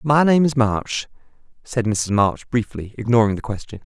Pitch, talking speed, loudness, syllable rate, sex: 115 Hz, 170 wpm, -20 LUFS, 4.8 syllables/s, male